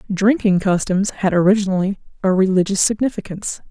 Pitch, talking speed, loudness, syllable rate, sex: 195 Hz, 115 wpm, -18 LUFS, 5.9 syllables/s, female